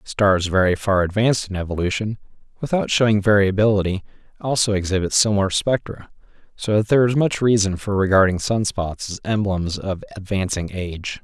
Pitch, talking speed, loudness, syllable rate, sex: 100 Hz, 145 wpm, -20 LUFS, 5.6 syllables/s, male